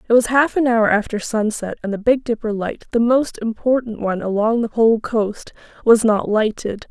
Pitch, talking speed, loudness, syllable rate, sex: 225 Hz, 200 wpm, -18 LUFS, 5.1 syllables/s, female